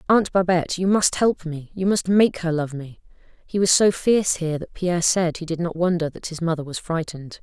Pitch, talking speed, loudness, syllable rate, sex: 175 Hz, 225 wpm, -21 LUFS, 5.7 syllables/s, female